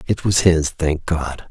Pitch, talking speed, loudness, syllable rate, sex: 85 Hz, 200 wpm, -19 LUFS, 3.7 syllables/s, male